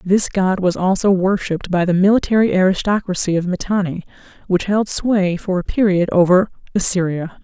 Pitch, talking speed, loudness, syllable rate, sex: 190 Hz, 155 wpm, -17 LUFS, 5.3 syllables/s, female